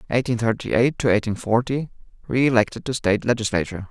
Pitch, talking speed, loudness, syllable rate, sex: 115 Hz, 140 wpm, -21 LUFS, 6.3 syllables/s, male